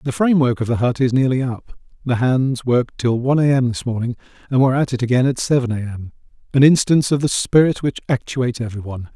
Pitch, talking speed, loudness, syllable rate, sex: 125 Hz, 215 wpm, -18 LUFS, 6.3 syllables/s, male